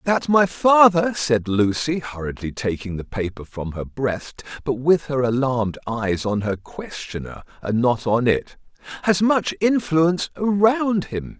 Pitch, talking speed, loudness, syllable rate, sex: 140 Hz, 155 wpm, -21 LUFS, 4.1 syllables/s, male